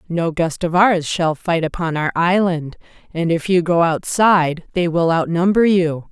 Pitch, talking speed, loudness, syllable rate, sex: 170 Hz, 175 wpm, -17 LUFS, 4.4 syllables/s, female